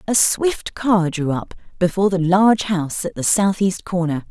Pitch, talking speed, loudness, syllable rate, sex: 185 Hz, 180 wpm, -18 LUFS, 4.8 syllables/s, female